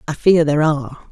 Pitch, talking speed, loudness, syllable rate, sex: 155 Hz, 215 wpm, -16 LUFS, 6.4 syllables/s, female